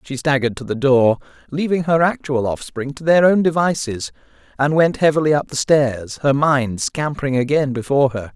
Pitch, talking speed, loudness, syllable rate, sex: 140 Hz, 180 wpm, -18 LUFS, 5.3 syllables/s, male